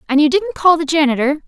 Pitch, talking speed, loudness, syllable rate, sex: 310 Hz, 245 wpm, -15 LUFS, 6.4 syllables/s, female